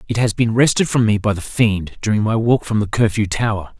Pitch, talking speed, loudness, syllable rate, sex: 110 Hz, 255 wpm, -17 LUFS, 5.6 syllables/s, male